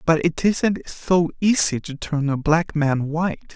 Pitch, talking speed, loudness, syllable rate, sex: 160 Hz, 185 wpm, -21 LUFS, 4.0 syllables/s, male